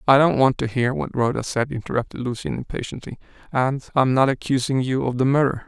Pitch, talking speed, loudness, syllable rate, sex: 130 Hz, 210 wpm, -21 LUFS, 6.0 syllables/s, male